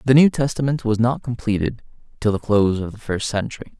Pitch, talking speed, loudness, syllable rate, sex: 115 Hz, 205 wpm, -20 LUFS, 6.1 syllables/s, male